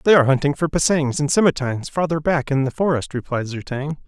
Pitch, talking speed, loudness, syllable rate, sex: 145 Hz, 220 wpm, -20 LUFS, 6.2 syllables/s, male